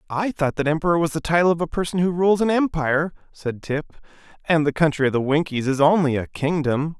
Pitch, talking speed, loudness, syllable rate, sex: 160 Hz, 225 wpm, -21 LUFS, 6.0 syllables/s, male